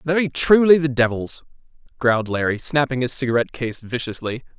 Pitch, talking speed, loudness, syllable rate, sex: 130 Hz, 145 wpm, -20 LUFS, 5.8 syllables/s, male